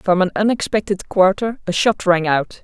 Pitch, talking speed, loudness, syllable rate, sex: 190 Hz, 180 wpm, -17 LUFS, 4.8 syllables/s, female